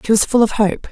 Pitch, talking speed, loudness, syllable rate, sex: 215 Hz, 325 wpm, -15 LUFS, 6.2 syllables/s, female